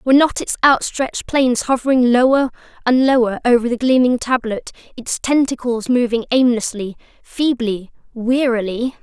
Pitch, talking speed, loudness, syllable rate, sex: 245 Hz, 120 wpm, -17 LUFS, 5.0 syllables/s, female